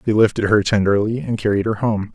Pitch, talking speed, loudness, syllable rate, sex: 110 Hz, 225 wpm, -18 LUFS, 6.0 syllables/s, male